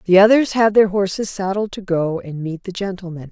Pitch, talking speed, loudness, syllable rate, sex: 190 Hz, 215 wpm, -18 LUFS, 5.4 syllables/s, female